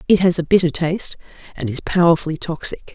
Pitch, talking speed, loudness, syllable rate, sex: 165 Hz, 185 wpm, -18 LUFS, 6.3 syllables/s, female